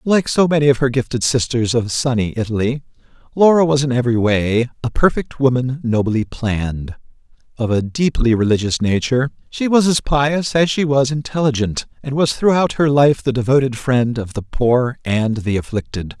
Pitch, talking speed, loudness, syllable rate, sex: 130 Hz, 175 wpm, -17 LUFS, 5.1 syllables/s, male